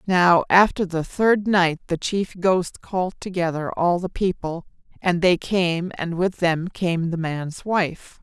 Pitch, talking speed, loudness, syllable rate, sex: 175 Hz, 170 wpm, -22 LUFS, 3.8 syllables/s, female